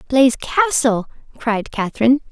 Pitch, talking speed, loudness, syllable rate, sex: 250 Hz, 105 wpm, -18 LUFS, 5.1 syllables/s, female